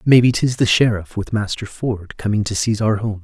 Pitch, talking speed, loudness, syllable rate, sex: 110 Hz, 220 wpm, -18 LUFS, 5.4 syllables/s, male